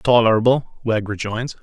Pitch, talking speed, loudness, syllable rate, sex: 115 Hz, 110 wpm, -19 LUFS, 4.6 syllables/s, male